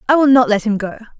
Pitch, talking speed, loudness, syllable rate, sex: 235 Hz, 300 wpm, -14 LUFS, 6.5 syllables/s, female